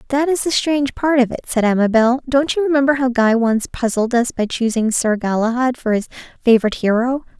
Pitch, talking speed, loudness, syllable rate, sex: 245 Hz, 205 wpm, -17 LUFS, 5.7 syllables/s, female